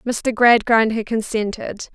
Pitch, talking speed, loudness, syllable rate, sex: 225 Hz, 125 wpm, -17 LUFS, 4.0 syllables/s, female